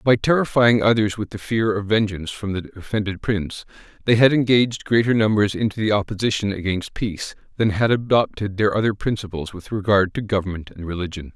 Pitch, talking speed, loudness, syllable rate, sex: 105 Hz, 180 wpm, -21 LUFS, 5.9 syllables/s, male